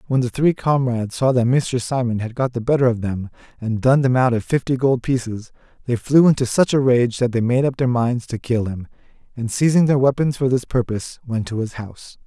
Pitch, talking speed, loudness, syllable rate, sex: 125 Hz, 235 wpm, -19 LUFS, 5.5 syllables/s, male